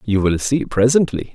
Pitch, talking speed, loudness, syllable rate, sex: 120 Hz, 180 wpm, -17 LUFS, 4.8 syllables/s, male